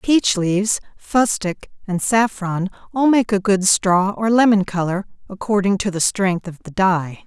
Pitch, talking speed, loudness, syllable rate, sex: 200 Hz, 165 wpm, -18 LUFS, 4.3 syllables/s, female